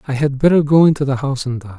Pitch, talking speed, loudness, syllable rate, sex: 140 Hz, 305 wpm, -15 LUFS, 7.4 syllables/s, male